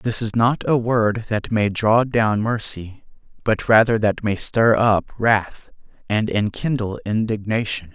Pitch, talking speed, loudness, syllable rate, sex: 110 Hz, 150 wpm, -19 LUFS, 3.8 syllables/s, male